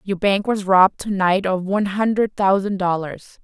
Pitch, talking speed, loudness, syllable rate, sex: 195 Hz, 190 wpm, -19 LUFS, 4.8 syllables/s, female